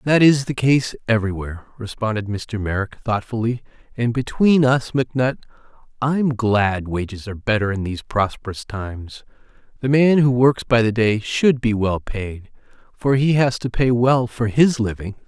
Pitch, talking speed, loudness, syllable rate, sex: 115 Hz, 165 wpm, -19 LUFS, 4.8 syllables/s, male